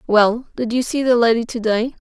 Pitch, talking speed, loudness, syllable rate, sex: 235 Hz, 230 wpm, -18 LUFS, 5.1 syllables/s, female